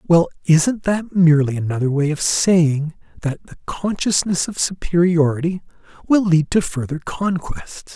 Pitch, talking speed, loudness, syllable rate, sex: 170 Hz, 135 wpm, -18 LUFS, 4.4 syllables/s, male